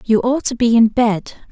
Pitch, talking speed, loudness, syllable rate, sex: 230 Hz, 235 wpm, -15 LUFS, 4.7 syllables/s, female